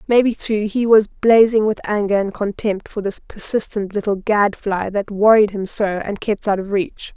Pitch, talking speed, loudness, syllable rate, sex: 205 Hz, 200 wpm, -18 LUFS, 4.6 syllables/s, female